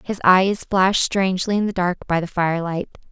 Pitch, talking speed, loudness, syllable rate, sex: 185 Hz, 190 wpm, -19 LUFS, 5.7 syllables/s, female